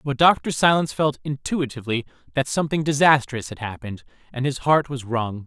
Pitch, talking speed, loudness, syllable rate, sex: 135 Hz, 165 wpm, -22 LUFS, 5.7 syllables/s, male